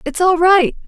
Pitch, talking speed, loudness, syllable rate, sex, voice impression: 350 Hz, 205 wpm, -13 LUFS, 4.5 syllables/s, female, feminine, adult-like, clear, slightly fluent, slightly intellectual, friendly